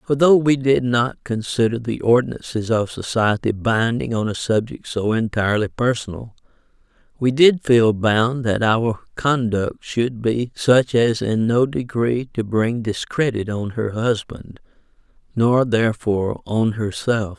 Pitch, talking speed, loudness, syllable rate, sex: 115 Hz, 140 wpm, -19 LUFS, 4.1 syllables/s, male